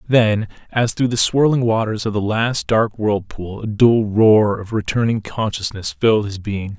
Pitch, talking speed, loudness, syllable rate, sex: 110 Hz, 175 wpm, -18 LUFS, 4.5 syllables/s, male